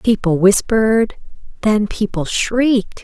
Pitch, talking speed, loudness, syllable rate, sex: 215 Hz, 80 wpm, -16 LUFS, 3.9 syllables/s, female